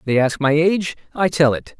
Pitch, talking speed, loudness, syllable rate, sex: 155 Hz, 235 wpm, -18 LUFS, 5.4 syllables/s, male